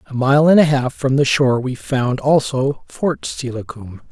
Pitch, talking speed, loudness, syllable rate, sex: 135 Hz, 190 wpm, -17 LUFS, 4.4 syllables/s, male